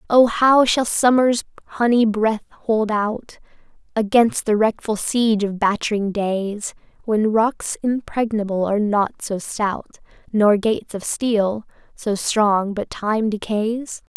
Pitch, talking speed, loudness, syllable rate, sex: 215 Hz, 130 wpm, -19 LUFS, 3.8 syllables/s, female